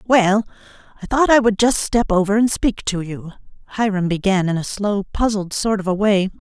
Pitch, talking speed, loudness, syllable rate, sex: 205 Hz, 205 wpm, -18 LUFS, 5.1 syllables/s, female